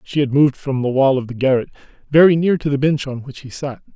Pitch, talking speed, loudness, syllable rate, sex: 135 Hz, 275 wpm, -17 LUFS, 6.3 syllables/s, male